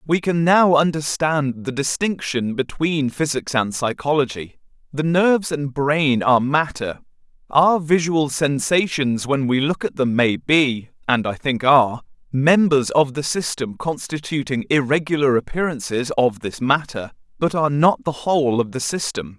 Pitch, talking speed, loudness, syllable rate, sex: 140 Hz, 150 wpm, -19 LUFS, 4.5 syllables/s, male